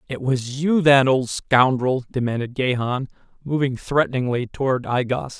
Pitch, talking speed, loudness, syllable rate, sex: 130 Hz, 145 wpm, -21 LUFS, 4.6 syllables/s, male